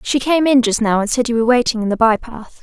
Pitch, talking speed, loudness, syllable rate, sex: 240 Hz, 320 wpm, -15 LUFS, 6.3 syllables/s, female